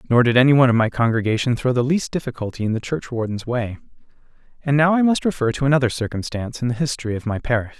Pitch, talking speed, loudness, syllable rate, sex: 125 Hz, 215 wpm, -20 LUFS, 7.2 syllables/s, male